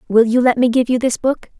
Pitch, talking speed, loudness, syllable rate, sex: 245 Hz, 300 wpm, -15 LUFS, 5.8 syllables/s, female